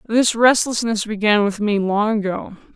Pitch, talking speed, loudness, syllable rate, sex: 215 Hz, 155 wpm, -18 LUFS, 4.4 syllables/s, female